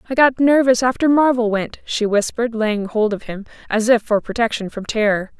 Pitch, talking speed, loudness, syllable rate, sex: 230 Hz, 200 wpm, -18 LUFS, 5.3 syllables/s, female